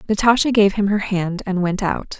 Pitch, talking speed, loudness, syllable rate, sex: 200 Hz, 220 wpm, -18 LUFS, 5.1 syllables/s, female